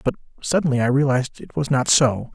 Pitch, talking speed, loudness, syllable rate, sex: 135 Hz, 205 wpm, -20 LUFS, 6.2 syllables/s, male